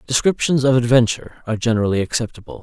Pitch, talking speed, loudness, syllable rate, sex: 120 Hz, 135 wpm, -18 LUFS, 7.3 syllables/s, male